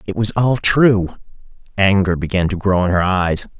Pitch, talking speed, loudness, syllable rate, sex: 100 Hz, 185 wpm, -16 LUFS, 4.7 syllables/s, male